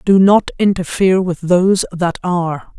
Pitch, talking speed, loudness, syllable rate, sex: 180 Hz, 150 wpm, -15 LUFS, 4.8 syllables/s, female